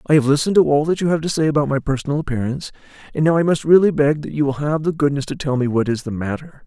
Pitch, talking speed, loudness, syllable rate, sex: 145 Hz, 295 wpm, -18 LUFS, 7.2 syllables/s, male